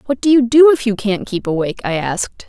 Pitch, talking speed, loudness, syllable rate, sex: 225 Hz, 265 wpm, -15 LUFS, 6.1 syllables/s, female